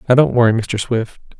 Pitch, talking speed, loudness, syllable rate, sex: 120 Hz, 215 wpm, -16 LUFS, 5.7 syllables/s, male